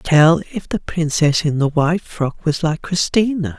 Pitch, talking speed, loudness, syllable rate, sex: 160 Hz, 185 wpm, -18 LUFS, 4.3 syllables/s, male